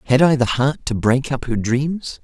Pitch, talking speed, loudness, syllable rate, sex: 130 Hz, 240 wpm, -19 LUFS, 4.4 syllables/s, male